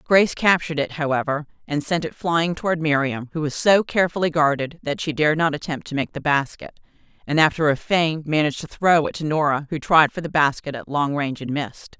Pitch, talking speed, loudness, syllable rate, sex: 155 Hz, 220 wpm, -21 LUFS, 5.9 syllables/s, female